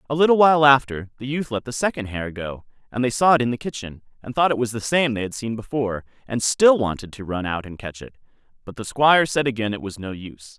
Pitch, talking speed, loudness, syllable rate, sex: 120 Hz, 260 wpm, -21 LUFS, 6.2 syllables/s, male